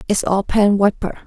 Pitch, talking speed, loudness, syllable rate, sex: 200 Hz, 190 wpm, -16 LUFS, 5.1 syllables/s, female